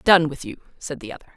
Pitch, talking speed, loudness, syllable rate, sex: 145 Hz, 265 wpm, -23 LUFS, 6.7 syllables/s, female